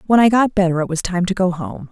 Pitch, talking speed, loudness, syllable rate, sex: 185 Hz, 315 wpm, -17 LUFS, 6.3 syllables/s, female